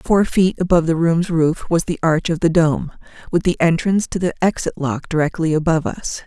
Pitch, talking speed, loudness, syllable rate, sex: 165 Hz, 210 wpm, -18 LUFS, 5.5 syllables/s, female